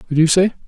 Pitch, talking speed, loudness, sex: 170 Hz, 355 wpm, -15 LUFS, male